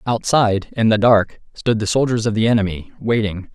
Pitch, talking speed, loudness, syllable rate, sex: 110 Hz, 185 wpm, -18 LUFS, 5.4 syllables/s, male